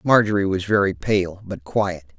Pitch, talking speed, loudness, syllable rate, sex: 95 Hz, 165 wpm, -21 LUFS, 4.4 syllables/s, male